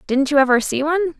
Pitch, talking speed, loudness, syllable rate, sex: 295 Hz, 250 wpm, -17 LUFS, 7.9 syllables/s, female